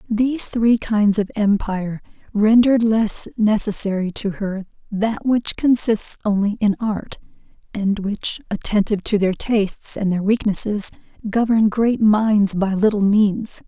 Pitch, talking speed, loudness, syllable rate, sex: 210 Hz, 135 wpm, -19 LUFS, 4.2 syllables/s, female